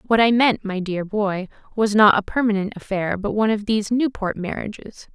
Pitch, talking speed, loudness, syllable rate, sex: 210 Hz, 200 wpm, -20 LUFS, 5.4 syllables/s, female